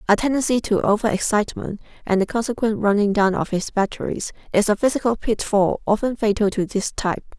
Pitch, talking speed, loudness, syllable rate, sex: 210 Hz, 180 wpm, -21 LUFS, 5.8 syllables/s, female